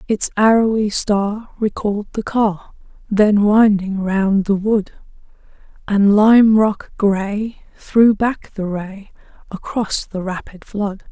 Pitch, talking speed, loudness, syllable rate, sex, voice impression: 205 Hz, 125 wpm, -17 LUFS, 3.3 syllables/s, female, feminine, very adult-like, muffled, very calm, unique, slightly kind